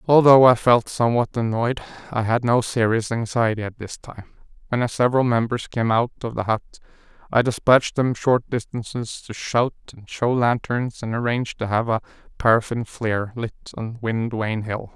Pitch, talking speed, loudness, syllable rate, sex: 115 Hz, 175 wpm, -21 LUFS, 5.1 syllables/s, male